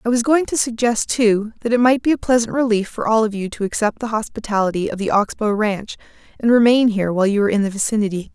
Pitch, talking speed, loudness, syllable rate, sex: 220 Hz, 250 wpm, -18 LUFS, 6.5 syllables/s, female